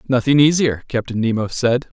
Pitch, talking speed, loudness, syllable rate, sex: 125 Hz, 150 wpm, -17 LUFS, 5.4 syllables/s, male